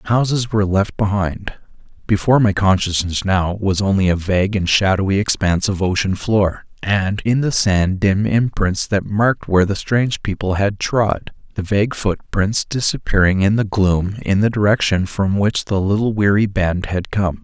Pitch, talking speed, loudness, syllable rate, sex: 100 Hz, 175 wpm, -17 LUFS, 4.8 syllables/s, male